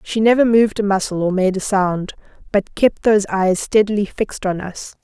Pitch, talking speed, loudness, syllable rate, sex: 200 Hz, 200 wpm, -17 LUFS, 5.4 syllables/s, female